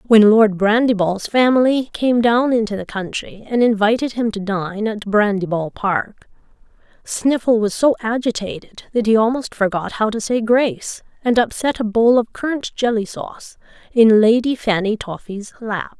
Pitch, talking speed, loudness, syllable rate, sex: 220 Hz, 160 wpm, -17 LUFS, 4.6 syllables/s, female